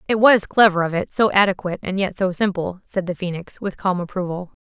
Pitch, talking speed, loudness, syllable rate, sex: 190 Hz, 205 wpm, -20 LUFS, 5.8 syllables/s, female